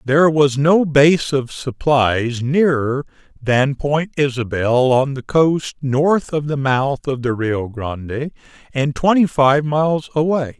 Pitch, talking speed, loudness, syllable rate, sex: 140 Hz, 145 wpm, -17 LUFS, 3.7 syllables/s, male